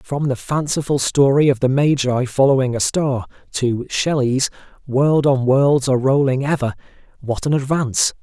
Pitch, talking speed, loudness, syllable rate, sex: 135 Hz, 155 wpm, -18 LUFS, 4.7 syllables/s, male